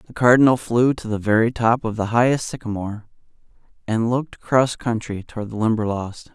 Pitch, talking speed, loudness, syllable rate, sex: 115 Hz, 170 wpm, -20 LUFS, 5.8 syllables/s, male